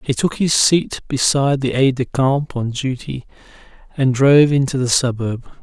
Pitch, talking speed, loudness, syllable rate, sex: 130 Hz, 170 wpm, -17 LUFS, 4.8 syllables/s, male